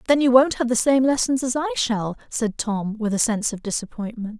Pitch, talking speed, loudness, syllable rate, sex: 230 Hz, 230 wpm, -21 LUFS, 5.6 syllables/s, female